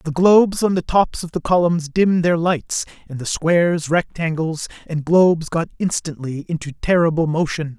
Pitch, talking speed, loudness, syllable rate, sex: 165 Hz, 170 wpm, -19 LUFS, 4.9 syllables/s, male